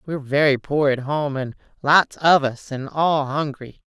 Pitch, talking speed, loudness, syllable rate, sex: 140 Hz, 185 wpm, -20 LUFS, 4.4 syllables/s, female